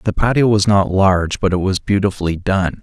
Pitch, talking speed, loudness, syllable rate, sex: 95 Hz, 210 wpm, -16 LUFS, 5.6 syllables/s, male